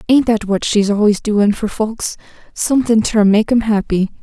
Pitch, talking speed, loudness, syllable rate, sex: 215 Hz, 170 wpm, -15 LUFS, 4.7 syllables/s, female